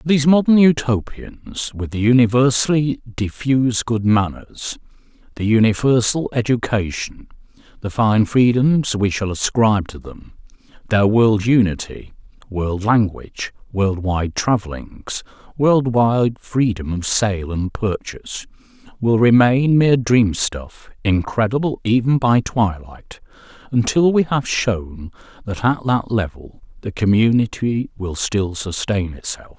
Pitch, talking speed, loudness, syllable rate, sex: 110 Hz, 110 wpm, -18 LUFS, 4.1 syllables/s, male